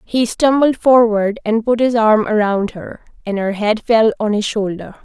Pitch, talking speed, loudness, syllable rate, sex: 220 Hz, 190 wpm, -15 LUFS, 4.2 syllables/s, female